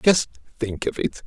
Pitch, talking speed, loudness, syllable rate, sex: 130 Hz, 190 wpm, -25 LUFS, 4.3 syllables/s, male